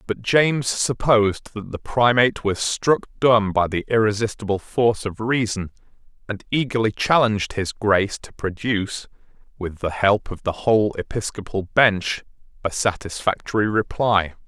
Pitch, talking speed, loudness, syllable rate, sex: 105 Hz, 135 wpm, -21 LUFS, 4.8 syllables/s, male